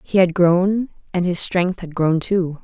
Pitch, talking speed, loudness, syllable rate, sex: 180 Hz, 205 wpm, -19 LUFS, 3.9 syllables/s, female